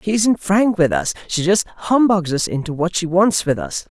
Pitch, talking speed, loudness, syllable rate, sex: 175 Hz, 225 wpm, -18 LUFS, 4.6 syllables/s, male